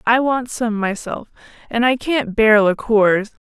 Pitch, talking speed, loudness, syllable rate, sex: 225 Hz, 155 wpm, -17 LUFS, 3.9 syllables/s, female